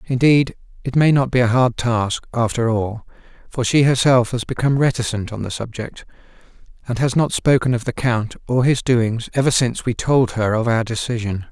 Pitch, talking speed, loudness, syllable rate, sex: 120 Hz, 195 wpm, -18 LUFS, 5.2 syllables/s, male